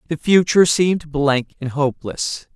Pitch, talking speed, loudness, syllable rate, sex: 150 Hz, 140 wpm, -18 LUFS, 4.8 syllables/s, male